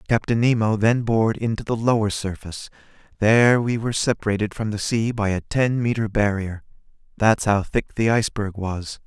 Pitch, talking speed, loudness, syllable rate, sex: 110 Hz, 170 wpm, -21 LUFS, 5.4 syllables/s, male